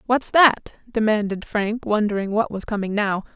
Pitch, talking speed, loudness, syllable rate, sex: 215 Hz, 160 wpm, -21 LUFS, 4.7 syllables/s, female